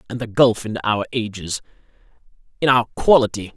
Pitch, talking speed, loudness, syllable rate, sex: 110 Hz, 135 wpm, -19 LUFS, 5.6 syllables/s, male